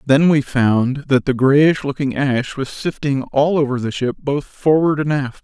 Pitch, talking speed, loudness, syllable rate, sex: 140 Hz, 200 wpm, -17 LUFS, 4.2 syllables/s, male